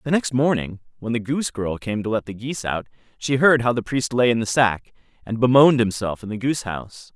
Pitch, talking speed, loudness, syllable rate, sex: 120 Hz, 245 wpm, -21 LUFS, 5.9 syllables/s, male